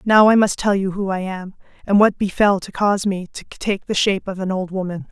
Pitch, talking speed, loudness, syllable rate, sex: 195 Hz, 260 wpm, -19 LUFS, 5.5 syllables/s, female